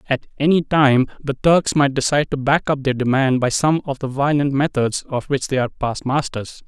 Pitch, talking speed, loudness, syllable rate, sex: 140 Hz, 215 wpm, -19 LUFS, 5.2 syllables/s, male